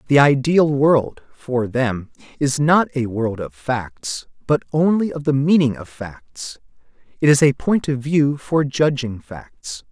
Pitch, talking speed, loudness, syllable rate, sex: 140 Hz, 165 wpm, -18 LUFS, 3.7 syllables/s, male